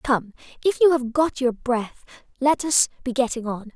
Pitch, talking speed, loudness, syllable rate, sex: 255 Hz, 190 wpm, -22 LUFS, 4.5 syllables/s, female